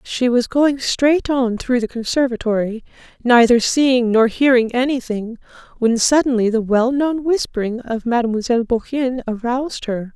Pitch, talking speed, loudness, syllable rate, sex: 245 Hz, 135 wpm, -17 LUFS, 4.8 syllables/s, female